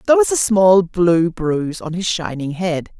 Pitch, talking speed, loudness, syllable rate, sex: 180 Hz, 200 wpm, -17 LUFS, 4.6 syllables/s, female